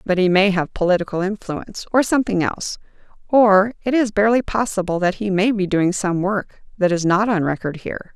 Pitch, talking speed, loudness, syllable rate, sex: 195 Hz, 200 wpm, -19 LUFS, 5.7 syllables/s, female